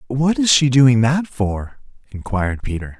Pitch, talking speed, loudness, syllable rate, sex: 120 Hz, 160 wpm, -17 LUFS, 4.4 syllables/s, male